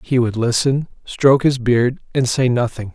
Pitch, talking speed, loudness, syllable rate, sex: 125 Hz, 185 wpm, -17 LUFS, 4.7 syllables/s, male